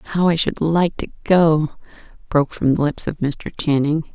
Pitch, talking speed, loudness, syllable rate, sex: 155 Hz, 190 wpm, -19 LUFS, 4.9 syllables/s, female